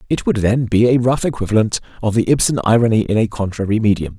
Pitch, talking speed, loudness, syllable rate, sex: 110 Hz, 215 wpm, -16 LUFS, 6.4 syllables/s, male